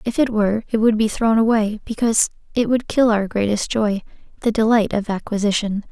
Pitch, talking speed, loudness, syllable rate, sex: 220 Hz, 185 wpm, -19 LUFS, 5.6 syllables/s, female